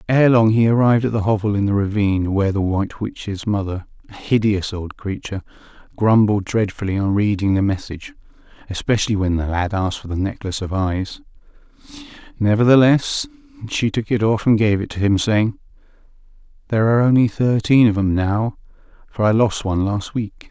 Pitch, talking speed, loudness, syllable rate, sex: 105 Hz, 170 wpm, -18 LUFS, 5.6 syllables/s, male